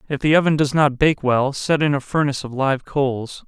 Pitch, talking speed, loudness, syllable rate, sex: 140 Hz, 240 wpm, -19 LUFS, 5.5 syllables/s, male